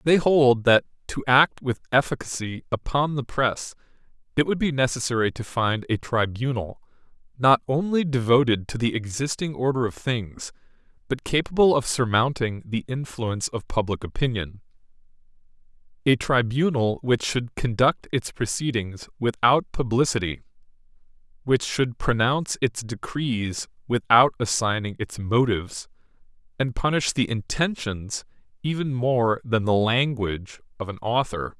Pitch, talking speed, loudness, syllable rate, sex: 125 Hz, 125 wpm, -24 LUFS, 4.6 syllables/s, male